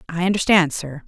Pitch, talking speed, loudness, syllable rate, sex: 170 Hz, 165 wpm, -18 LUFS, 5.6 syllables/s, female